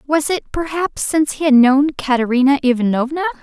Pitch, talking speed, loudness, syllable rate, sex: 285 Hz, 160 wpm, -16 LUFS, 5.4 syllables/s, female